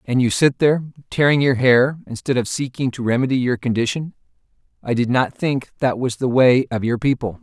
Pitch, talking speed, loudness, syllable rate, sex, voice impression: 130 Hz, 200 wpm, -19 LUFS, 5.6 syllables/s, male, very masculine, slightly middle-aged, thick, slightly tensed, slightly powerful, slightly bright, slightly soft, clear, fluent, slightly raspy, cool, intellectual, slightly refreshing, sincere, very calm, mature, very friendly, very reassuring, unique, elegant, slightly wild, sweet, lively, very kind, slightly modest